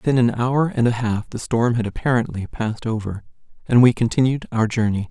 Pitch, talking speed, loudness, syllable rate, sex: 115 Hz, 200 wpm, -20 LUFS, 5.6 syllables/s, male